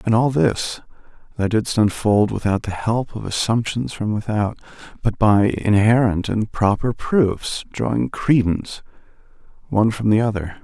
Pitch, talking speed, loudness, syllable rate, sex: 105 Hz, 140 wpm, -19 LUFS, 4.4 syllables/s, male